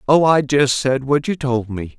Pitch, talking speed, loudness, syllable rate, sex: 135 Hz, 240 wpm, -17 LUFS, 4.4 syllables/s, male